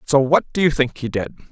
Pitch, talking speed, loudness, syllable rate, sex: 140 Hz, 275 wpm, -19 LUFS, 5.9 syllables/s, male